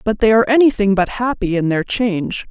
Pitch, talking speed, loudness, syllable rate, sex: 215 Hz, 215 wpm, -16 LUFS, 5.8 syllables/s, female